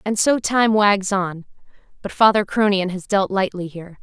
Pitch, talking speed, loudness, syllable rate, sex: 200 Hz, 180 wpm, -18 LUFS, 4.8 syllables/s, female